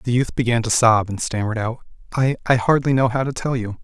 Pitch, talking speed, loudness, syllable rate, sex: 120 Hz, 235 wpm, -19 LUFS, 6.1 syllables/s, male